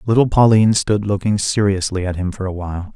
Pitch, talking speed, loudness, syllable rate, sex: 100 Hz, 205 wpm, -17 LUFS, 6.1 syllables/s, male